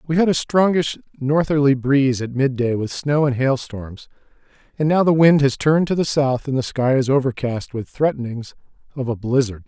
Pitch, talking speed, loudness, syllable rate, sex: 135 Hz, 200 wpm, -19 LUFS, 5.2 syllables/s, male